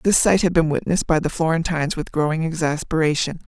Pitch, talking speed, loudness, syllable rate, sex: 160 Hz, 185 wpm, -20 LUFS, 6.3 syllables/s, female